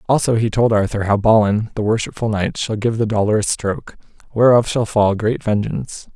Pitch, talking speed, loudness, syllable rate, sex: 110 Hz, 185 wpm, -17 LUFS, 5.4 syllables/s, male